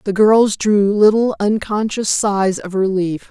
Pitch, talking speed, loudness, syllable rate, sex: 205 Hz, 145 wpm, -15 LUFS, 3.9 syllables/s, female